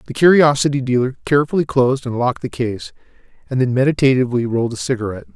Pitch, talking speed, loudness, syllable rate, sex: 130 Hz, 170 wpm, -17 LUFS, 7.4 syllables/s, male